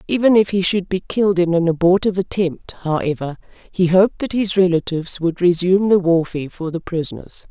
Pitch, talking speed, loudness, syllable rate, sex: 180 Hz, 185 wpm, -18 LUFS, 5.8 syllables/s, female